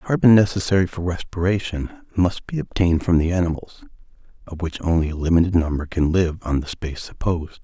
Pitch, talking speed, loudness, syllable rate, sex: 90 Hz, 180 wpm, -21 LUFS, 6.0 syllables/s, male